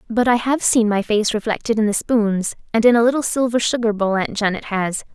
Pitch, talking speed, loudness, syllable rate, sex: 220 Hz, 235 wpm, -18 LUFS, 5.5 syllables/s, female